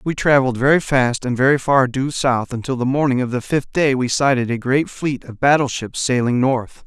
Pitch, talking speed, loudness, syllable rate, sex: 130 Hz, 220 wpm, -18 LUFS, 5.2 syllables/s, male